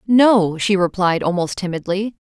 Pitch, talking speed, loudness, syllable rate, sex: 195 Hz, 135 wpm, -17 LUFS, 4.4 syllables/s, female